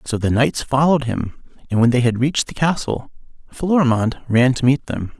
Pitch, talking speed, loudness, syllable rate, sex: 130 Hz, 195 wpm, -18 LUFS, 5.3 syllables/s, male